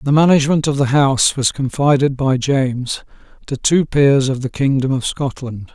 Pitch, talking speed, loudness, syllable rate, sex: 135 Hz, 180 wpm, -16 LUFS, 5.0 syllables/s, male